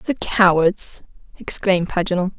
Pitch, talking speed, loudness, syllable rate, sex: 185 Hz, 100 wpm, -18 LUFS, 4.5 syllables/s, female